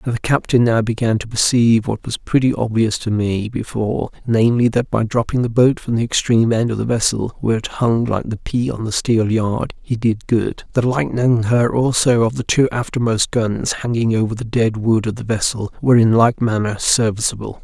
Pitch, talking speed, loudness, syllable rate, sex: 115 Hz, 205 wpm, -17 LUFS, 5.3 syllables/s, male